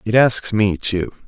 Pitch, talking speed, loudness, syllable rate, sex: 105 Hz, 190 wpm, -18 LUFS, 3.9 syllables/s, male